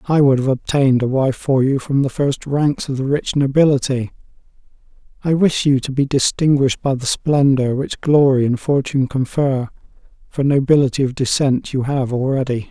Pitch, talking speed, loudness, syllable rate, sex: 135 Hz, 175 wpm, -17 LUFS, 5.1 syllables/s, male